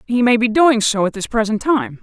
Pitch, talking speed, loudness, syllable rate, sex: 235 Hz, 265 wpm, -16 LUFS, 5.4 syllables/s, female